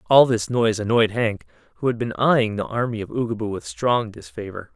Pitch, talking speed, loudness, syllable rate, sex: 110 Hz, 200 wpm, -22 LUFS, 5.5 syllables/s, male